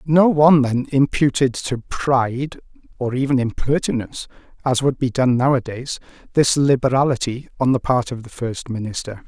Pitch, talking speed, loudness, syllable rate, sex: 130 Hz, 150 wpm, -19 LUFS, 5.0 syllables/s, male